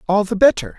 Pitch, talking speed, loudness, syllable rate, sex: 205 Hz, 230 wpm, -16 LUFS, 6.5 syllables/s, male